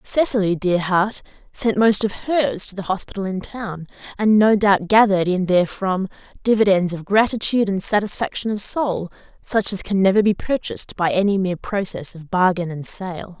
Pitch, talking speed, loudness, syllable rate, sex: 195 Hz, 175 wpm, -19 LUFS, 5.2 syllables/s, female